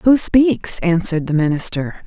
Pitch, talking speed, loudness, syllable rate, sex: 185 Hz, 145 wpm, -17 LUFS, 4.6 syllables/s, female